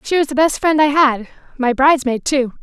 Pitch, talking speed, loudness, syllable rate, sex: 275 Hz, 205 wpm, -15 LUFS, 5.5 syllables/s, female